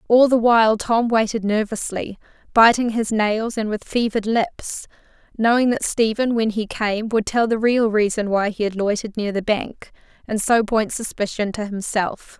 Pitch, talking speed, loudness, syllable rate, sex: 220 Hz, 180 wpm, -20 LUFS, 4.7 syllables/s, female